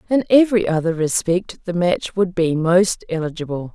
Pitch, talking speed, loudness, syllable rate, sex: 180 Hz, 160 wpm, -19 LUFS, 4.9 syllables/s, female